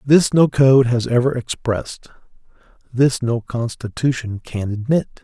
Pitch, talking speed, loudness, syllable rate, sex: 125 Hz, 125 wpm, -18 LUFS, 4.3 syllables/s, male